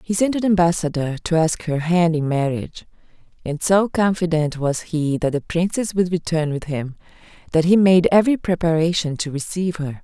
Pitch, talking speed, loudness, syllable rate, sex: 170 Hz, 180 wpm, -19 LUFS, 5.3 syllables/s, female